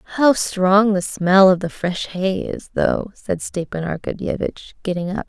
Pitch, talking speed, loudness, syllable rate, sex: 190 Hz, 170 wpm, -19 LUFS, 4.2 syllables/s, female